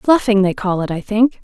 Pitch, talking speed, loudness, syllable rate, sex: 215 Hz, 250 wpm, -16 LUFS, 5.0 syllables/s, female